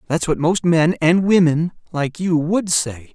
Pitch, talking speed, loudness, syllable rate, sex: 160 Hz, 155 wpm, -18 LUFS, 4.1 syllables/s, male